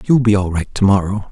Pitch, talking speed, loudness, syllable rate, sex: 100 Hz, 230 wpm, -15 LUFS, 6.1 syllables/s, male